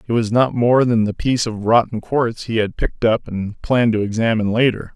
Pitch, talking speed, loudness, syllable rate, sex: 115 Hz, 230 wpm, -18 LUFS, 5.6 syllables/s, male